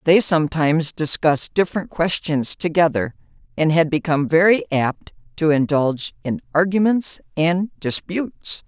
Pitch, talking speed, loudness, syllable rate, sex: 165 Hz, 120 wpm, -19 LUFS, 4.9 syllables/s, female